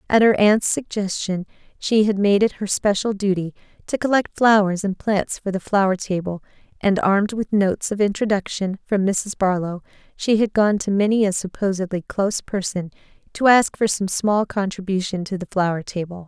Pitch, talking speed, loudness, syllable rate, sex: 200 Hz, 175 wpm, -20 LUFS, 5.1 syllables/s, female